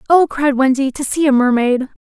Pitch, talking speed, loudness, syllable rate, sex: 270 Hz, 205 wpm, -15 LUFS, 5.3 syllables/s, female